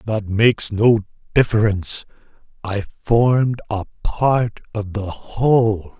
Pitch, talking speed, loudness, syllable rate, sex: 110 Hz, 110 wpm, -19 LUFS, 3.8 syllables/s, male